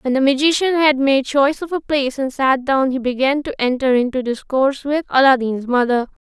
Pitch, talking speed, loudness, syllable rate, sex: 270 Hz, 200 wpm, -17 LUFS, 5.5 syllables/s, female